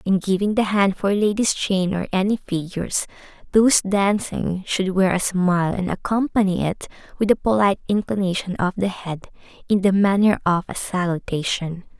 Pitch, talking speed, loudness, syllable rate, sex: 190 Hz, 160 wpm, -21 LUFS, 5.0 syllables/s, female